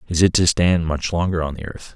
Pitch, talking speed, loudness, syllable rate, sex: 85 Hz, 275 wpm, -19 LUFS, 5.7 syllables/s, male